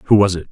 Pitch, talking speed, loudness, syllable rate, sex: 95 Hz, 350 wpm, -15 LUFS, 6.7 syllables/s, male